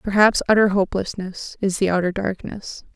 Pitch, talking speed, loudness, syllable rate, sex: 195 Hz, 140 wpm, -20 LUFS, 5.2 syllables/s, female